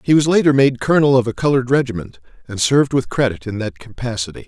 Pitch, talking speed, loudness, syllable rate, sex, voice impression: 125 Hz, 215 wpm, -17 LUFS, 6.8 syllables/s, male, masculine, adult-like, slightly middle-aged, slightly thick, slightly tensed, slightly powerful, very bright, slightly soft, very clear, very fluent, slightly raspy, cool, intellectual, very refreshing, sincere, slightly calm, slightly mature, friendly, reassuring, very unique, slightly elegant, wild, slightly sweet, very lively, kind, intense, slightly modest